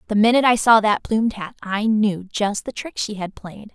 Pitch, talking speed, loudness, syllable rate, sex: 215 Hz, 240 wpm, -19 LUFS, 5.2 syllables/s, female